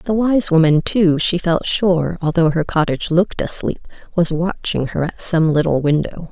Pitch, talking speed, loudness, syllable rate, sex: 170 Hz, 180 wpm, -17 LUFS, 4.7 syllables/s, female